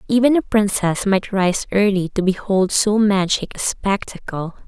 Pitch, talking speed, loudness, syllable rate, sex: 200 Hz, 155 wpm, -18 LUFS, 4.4 syllables/s, female